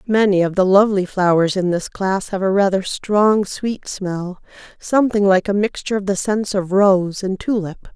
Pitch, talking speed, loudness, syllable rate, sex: 195 Hz, 190 wpm, -18 LUFS, 4.7 syllables/s, female